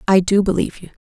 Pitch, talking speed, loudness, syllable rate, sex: 190 Hz, 235 wpm, -17 LUFS, 7.8 syllables/s, female